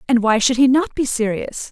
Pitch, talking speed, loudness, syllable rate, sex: 250 Hz, 245 wpm, -17 LUFS, 5.2 syllables/s, female